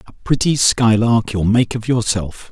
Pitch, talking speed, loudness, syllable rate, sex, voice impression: 115 Hz, 165 wpm, -16 LUFS, 4.2 syllables/s, male, very masculine, slightly old, very thick, slightly tensed, slightly powerful, dark, hard, slightly muffled, fluent, very cool, intellectual, slightly refreshing, sincere, very calm, very mature, very friendly, reassuring, unique, elegant, very wild, slightly sweet, lively, kind, slightly modest